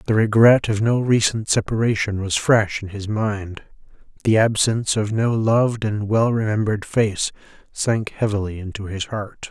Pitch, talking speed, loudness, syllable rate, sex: 105 Hz, 160 wpm, -20 LUFS, 4.7 syllables/s, male